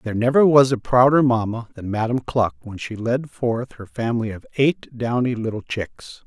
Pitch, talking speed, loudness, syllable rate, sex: 120 Hz, 190 wpm, -20 LUFS, 4.9 syllables/s, male